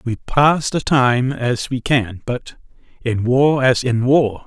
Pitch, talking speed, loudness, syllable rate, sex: 125 Hz, 175 wpm, -17 LUFS, 3.4 syllables/s, male